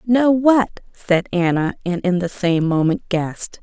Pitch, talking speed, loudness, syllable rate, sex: 190 Hz, 165 wpm, -18 LUFS, 4.2 syllables/s, female